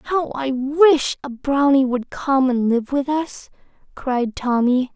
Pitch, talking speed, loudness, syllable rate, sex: 270 Hz, 160 wpm, -19 LUFS, 3.4 syllables/s, female